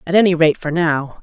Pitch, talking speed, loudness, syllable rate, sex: 165 Hz, 245 wpm, -16 LUFS, 5.6 syllables/s, female